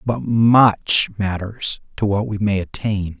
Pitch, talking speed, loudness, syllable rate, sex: 105 Hz, 150 wpm, -18 LUFS, 3.5 syllables/s, male